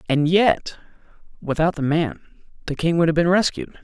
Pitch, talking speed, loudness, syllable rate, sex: 165 Hz, 170 wpm, -20 LUFS, 5.2 syllables/s, male